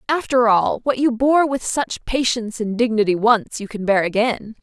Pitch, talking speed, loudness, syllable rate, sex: 235 Hz, 195 wpm, -19 LUFS, 4.8 syllables/s, female